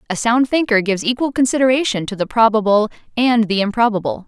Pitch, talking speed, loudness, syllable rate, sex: 225 Hz, 170 wpm, -16 LUFS, 6.3 syllables/s, female